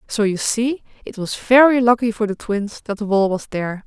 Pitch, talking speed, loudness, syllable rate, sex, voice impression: 220 Hz, 235 wpm, -18 LUFS, 5.1 syllables/s, female, feminine, adult-like, slightly muffled, intellectual, slightly sweet